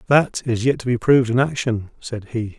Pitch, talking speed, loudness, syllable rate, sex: 120 Hz, 230 wpm, -20 LUFS, 5.3 syllables/s, male